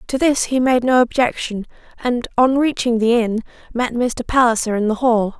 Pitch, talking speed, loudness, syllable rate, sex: 240 Hz, 190 wpm, -17 LUFS, 5.0 syllables/s, female